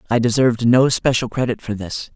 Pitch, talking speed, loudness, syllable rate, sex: 120 Hz, 195 wpm, -18 LUFS, 5.6 syllables/s, male